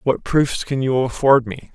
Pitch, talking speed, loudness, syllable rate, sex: 130 Hz, 205 wpm, -18 LUFS, 4.6 syllables/s, male